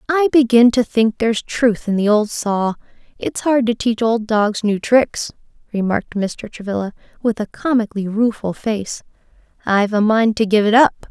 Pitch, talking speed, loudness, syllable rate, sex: 220 Hz, 180 wpm, -17 LUFS, 4.9 syllables/s, female